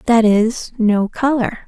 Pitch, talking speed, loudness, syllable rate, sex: 230 Hz, 145 wpm, -16 LUFS, 3.6 syllables/s, female